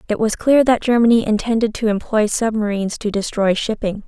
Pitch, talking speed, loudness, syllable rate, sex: 220 Hz, 175 wpm, -17 LUFS, 5.7 syllables/s, female